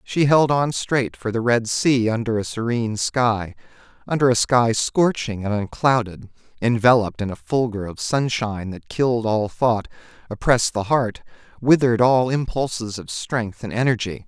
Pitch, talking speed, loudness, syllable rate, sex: 115 Hz, 160 wpm, -20 LUFS, 4.8 syllables/s, male